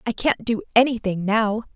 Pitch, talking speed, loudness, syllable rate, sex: 225 Hz, 135 wpm, -21 LUFS, 5.0 syllables/s, female